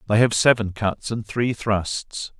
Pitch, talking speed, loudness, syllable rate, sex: 110 Hz, 175 wpm, -22 LUFS, 3.7 syllables/s, male